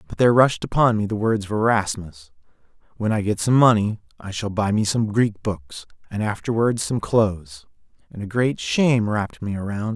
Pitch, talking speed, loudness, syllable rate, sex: 110 Hz, 195 wpm, -21 LUFS, 5.2 syllables/s, male